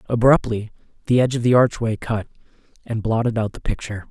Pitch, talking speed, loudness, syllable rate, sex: 115 Hz, 175 wpm, -20 LUFS, 6.3 syllables/s, male